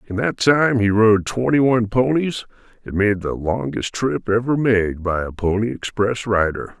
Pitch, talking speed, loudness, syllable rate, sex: 110 Hz, 175 wpm, -19 LUFS, 4.6 syllables/s, male